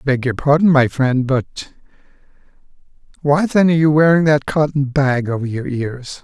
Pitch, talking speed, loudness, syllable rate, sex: 140 Hz, 175 wpm, -16 LUFS, 4.9 syllables/s, male